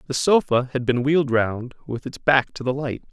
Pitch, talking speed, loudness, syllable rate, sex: 135 Hz, 230 wpm, -21 LUFS, 5.2 syllables/s, male